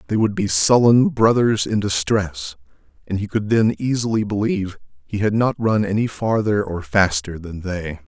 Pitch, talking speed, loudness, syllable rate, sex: 100 Hz, 170 wpm, -19 LUFS, 4.7 syllables/s, male